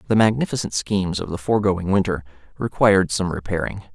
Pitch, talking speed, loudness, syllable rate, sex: 95 Hz, 150 wpm, -21 LUFS, 6.3 syllables/s, male